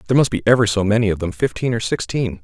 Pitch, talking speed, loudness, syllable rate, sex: 110 Hz, 270 wpm, -18 LUFS, 7.2 syllables/s, male